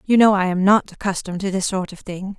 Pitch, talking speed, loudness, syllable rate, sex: 195 Hz, 275 wpm, -19 LUFS, 6.1 syllables/s, female